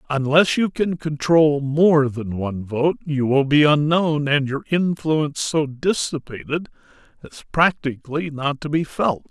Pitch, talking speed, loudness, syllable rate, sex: 150 Hz, 150 wpm, -20 LUFS, 4.2 syllables/s, male